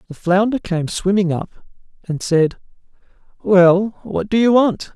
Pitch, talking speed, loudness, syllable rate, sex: 190 Hz, 145 wpm, -17 LUFS, 4.1 syllables/s, male